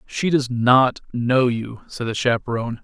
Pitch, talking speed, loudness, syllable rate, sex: 125 Hz, 170 wpm, -20 LUFS, 4.4 syllables/s, male